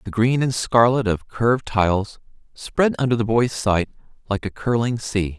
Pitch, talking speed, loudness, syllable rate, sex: 115 Hz, 180 wpm, -20 LUFS, 4.7 syllables/s, male